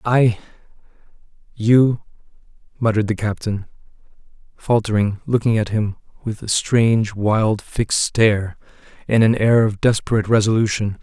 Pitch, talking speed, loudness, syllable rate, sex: 110 Hz, 115 wpm, -18 LUFS, 4.9 syllables/s, male